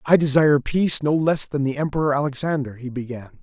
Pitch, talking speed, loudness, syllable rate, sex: 145 Hz, 195 wpm, -21 LUFS, 6.1 syllables/s, male